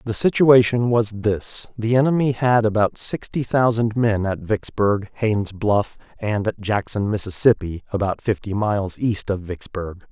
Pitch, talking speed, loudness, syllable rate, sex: 105 Hz, 150 wpm, -20 LUFS, 4.4 syllables/s, male